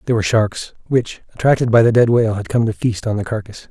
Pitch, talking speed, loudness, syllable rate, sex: 110 Hz, 260 wpm, -17 LUFS, 6.4 syllables/s, male